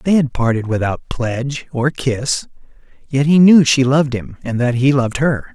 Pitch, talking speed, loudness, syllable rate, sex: 130 Hz, 195 wpm, -16 LUFS, 4.8 syllables/s, male